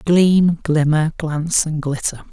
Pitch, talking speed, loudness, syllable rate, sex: 160 Hz, 130 wpm, -17 LUFS, 3.7 syllables/s, male